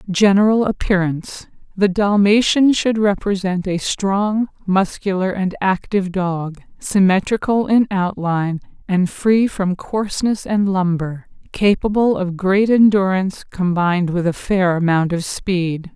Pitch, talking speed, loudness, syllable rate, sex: 190 Hz, 115 wpm, -17 LUFS, 4.2 syllables/s, female